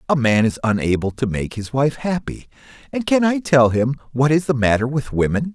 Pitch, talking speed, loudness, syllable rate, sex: 130 Hz, 215 wpm, -19 LUFS, 5.3 syllables/s, male